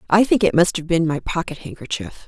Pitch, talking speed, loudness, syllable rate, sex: 170 Hz, 240 wpm, -19 LUFS, 5.8 syllables/s, female